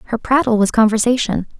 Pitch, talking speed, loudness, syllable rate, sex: 230 Hz, 150 wpm, -15 LUFS, 5.5 syllables/s, female